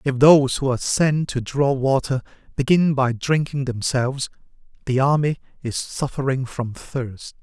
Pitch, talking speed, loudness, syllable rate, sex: 135 Hz, 145 wpm, -21 LUFS, 4.6 syllables/s, male